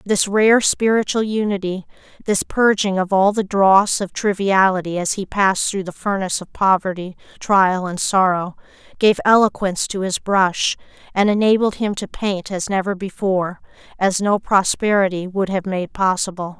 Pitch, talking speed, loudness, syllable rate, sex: 195 Hz, 150 wpm, -18 LUFS, 4.8 syllables/s, female